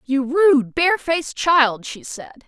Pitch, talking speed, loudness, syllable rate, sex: 290 Hz, 145 wpm, -17 LUFS, 4.0 syllables/s, female